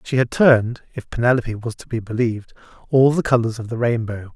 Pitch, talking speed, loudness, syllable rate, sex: 120 Hz, 205 wpm, -19 LUFS, 4.0 syllables/s, male